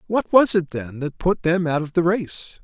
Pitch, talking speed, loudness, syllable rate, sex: 170 Hz, 250 wpm, -20 LUFS, 4.8 syllables/s, male